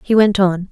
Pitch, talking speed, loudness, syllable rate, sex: 195 Hz, 250 wpm, -14 LUFS, 4.9 syllables/s, female